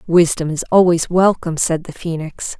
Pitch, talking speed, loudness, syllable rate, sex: 170 Hz, 160 wpm, -17 LUFS, 5.0 syllables/s, female